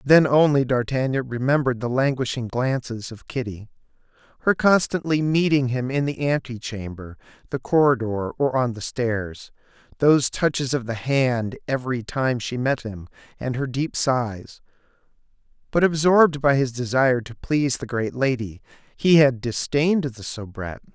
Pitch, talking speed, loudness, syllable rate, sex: 130 Hz, 145 wpm, -22 LUFS, 4.8 syllables/s, male